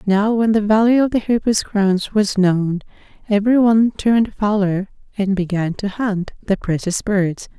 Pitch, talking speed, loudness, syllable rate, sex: 205 Hz, 165 wpm, -18 LUFS, 4.6 syllables/s, female